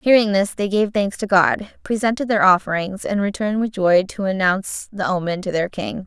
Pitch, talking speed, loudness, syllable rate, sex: 200 Hz, 210 wpm, -19 LUFS, 5.3 syllables/s, female